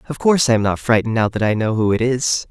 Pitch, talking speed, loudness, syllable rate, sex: 115 Hz, 310 wpm, -17 LUFS, 6.9 syllables/s, male